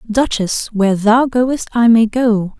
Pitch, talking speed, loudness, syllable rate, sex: 225 Hz, 160 wpm, -14 LUFS, 3.7 syllables/s, female